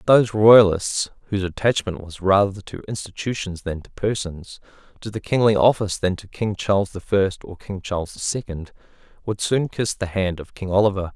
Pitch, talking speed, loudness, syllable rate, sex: 100 Hz, 185 wpm, -21 LUFS, 5.3 syllables/s, male